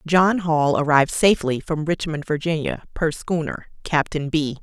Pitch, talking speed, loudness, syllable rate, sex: 155 Hz, 145 wpm, -21 LUFS, 4.8 syllables/s, female